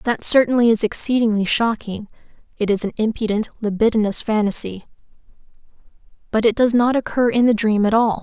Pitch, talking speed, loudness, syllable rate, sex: 220 Hz, 145 wpm, -18 LUFS, 5.8 syllables/s, female